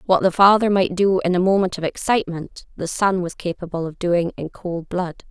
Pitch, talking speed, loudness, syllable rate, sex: 180 Hz, 215 wpm, -20 LUFS, 5.3 syllables/s, female